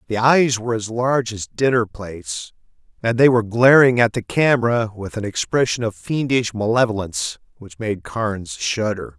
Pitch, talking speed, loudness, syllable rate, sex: 115 Hz, 165 wpm, -19 LUFS, 5.1 syllables/s, male